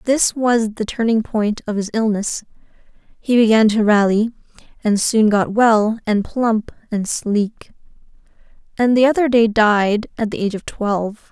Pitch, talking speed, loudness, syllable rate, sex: 220 Hz, 160 wpm, -17 LUFS, 4.3 syllables/s, female